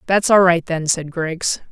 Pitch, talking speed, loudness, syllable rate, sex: 170 Hz, 210 wpm, -17 LUFS, 4.1 syllables/s, female